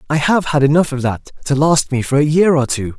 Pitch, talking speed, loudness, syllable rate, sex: 145 Hz, 280 wpm, -15 LUFS, 5.7 syllables/s, male